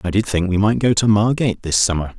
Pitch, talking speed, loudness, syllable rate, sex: 100 Hz, 275 wpm, -17 LUFS, 6.3 syllables/s, male